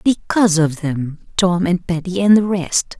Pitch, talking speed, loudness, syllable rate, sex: 180 Hz, 160 wpm, -17 LUFS, 4.4 syllables/s, female